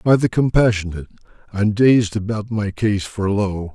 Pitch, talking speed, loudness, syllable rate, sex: 105 Hz, 160 wpm, -18 LUFS, 4.8 syllables/s, male